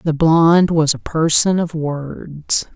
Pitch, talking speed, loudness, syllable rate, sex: 160 Hz, 150 wpm, -15 LUFS, 3.4 syllables/s, female